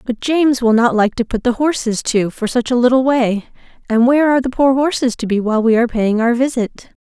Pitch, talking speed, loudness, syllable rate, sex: 245 Hz, 240 wpm, -15 LUFS, 5.9 syllables/s, female